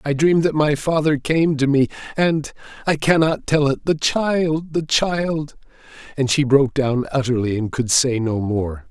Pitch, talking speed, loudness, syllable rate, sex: 145 Hz, 160 wpm, -19 LUFS, 4.4 syllables/s, male